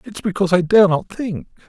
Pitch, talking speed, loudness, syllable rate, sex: 185 Hz, 215 wpm, -17 LUFS, 5.7 syllables/s, male